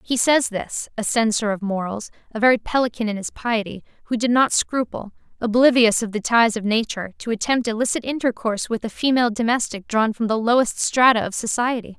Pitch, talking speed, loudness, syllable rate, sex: 225 Hz, 190 wpm, -20 LUFS, 5.7 syllables/s, female